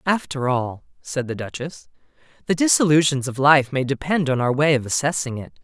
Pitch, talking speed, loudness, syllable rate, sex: 140 Hz, 180 wpm, -20 LUFS, 5.4 syllables/s, male